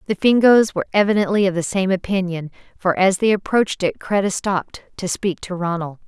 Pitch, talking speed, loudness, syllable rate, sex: 190 Hz, 190 wpm, -19 LUFS, 5.8 syllables/s, female